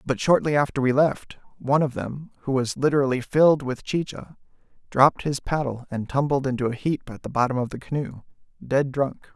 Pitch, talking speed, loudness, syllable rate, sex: 135 Hz, 190 wpm, -23 LUFS, 5.6 syllables/s, male